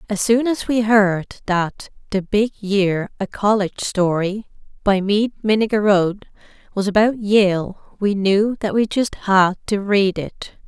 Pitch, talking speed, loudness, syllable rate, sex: 205 Hz, 145 wpm, -18 LUFS, 4.2 syllables/s, female